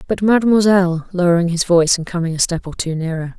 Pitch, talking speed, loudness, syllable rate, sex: 175 Hz, 195 wpm, -16 LUFS, 6.6 syllables/s, female